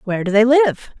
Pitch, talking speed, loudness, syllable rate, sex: 235 Hz, 240 wpm, -15 LUFS, 6.3 syllables/s, female